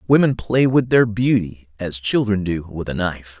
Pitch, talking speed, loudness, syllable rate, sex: 105 Hz, 195 wpm, -19 LUFS, 4.9 syllables/s, male